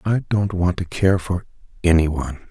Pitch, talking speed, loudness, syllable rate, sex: 90 Hz, 170 wpm, -20 LUFS, 4.8 syllables/s, male